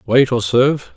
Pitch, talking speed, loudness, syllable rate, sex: 125 Hz, 190 wpm, -15 LUFS, 5.1 syllables/s, male